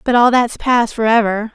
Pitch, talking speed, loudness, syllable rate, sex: 230 Hz, 235 wpm, -14 LUFS, 4.8 syllables/s, female